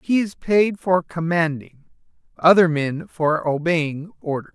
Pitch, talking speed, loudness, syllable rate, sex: 165 Hz, 130 wpm, -20 LUFS, 3.9 syllables/s, male